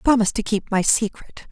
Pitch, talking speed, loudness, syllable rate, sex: 220 Hz, 200 wpm, -20 LUFS, 5.7 syllables/s, female